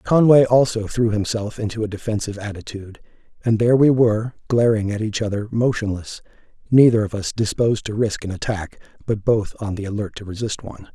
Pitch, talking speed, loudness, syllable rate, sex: 110 Hz, 180 wpm, -20 LUFS, 5.9 syllables/s, male